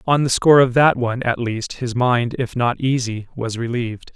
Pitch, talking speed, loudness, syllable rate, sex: 120 Hz, 215 wpm, -19 LUFS, 5.2 syllables/s, male